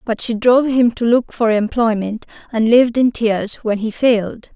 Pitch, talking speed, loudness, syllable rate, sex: 230 Hz, 200 wpm, -16 LUFS, 4.8 syllables/s, female